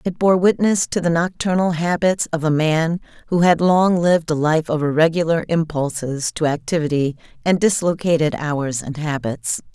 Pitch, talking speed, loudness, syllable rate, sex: 160 Hz, 160 wpm, -19 LUFS, 4.9 syllables/s, female